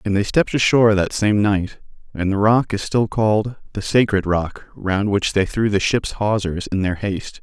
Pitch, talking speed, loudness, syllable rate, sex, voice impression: 105 Hz, 210 wpm, -19 LUFS, 4.9 syllables/s, male, masculine, adult-like, thick, tensed, powerful, soft, cool, calm, mature, friendly, reassuring, wild, lively, slightly kind